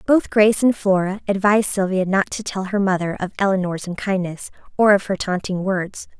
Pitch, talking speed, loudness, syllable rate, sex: 195 Hz, 185 wpm, -19 LUFS, 5.4 syllables/s, female